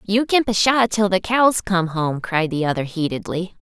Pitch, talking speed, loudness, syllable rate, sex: 195 Hz, 215 wpm, -19 LUFS, 4.7 syllables/s, female